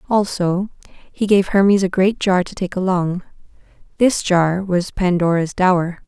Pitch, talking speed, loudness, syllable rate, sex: 185 Hz, 150 wpm, -17 LUFS, 4.4 syllables/s, female